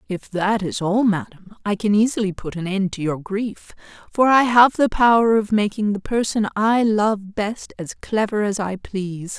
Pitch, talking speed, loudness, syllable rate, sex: 205 Hz, 200 wpm, -20 LUFS, 4.5 syllables/s, female